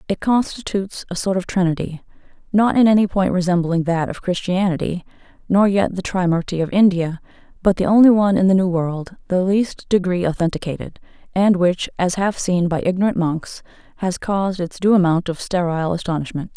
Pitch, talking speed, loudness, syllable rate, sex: 185 Hz, 175 wpm, -19 LUFS, 5.5 syllables/s, female